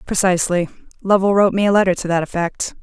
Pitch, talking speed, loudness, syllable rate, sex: 185 Hz, 190 wpm, -17 LUFS, 6.9 syllables/s, female